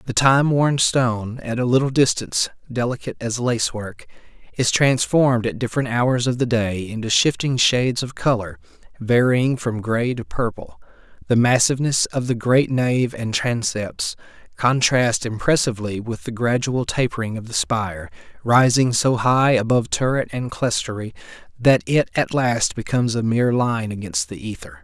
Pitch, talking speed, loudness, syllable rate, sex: 120 Hz, 155 wpm, -20 LUFS, 4.9 syllables/s, male